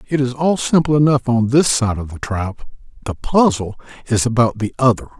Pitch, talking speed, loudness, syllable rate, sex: 125 Hz, 195 wpm, -17 LUFS, 5.2 syllables/s, male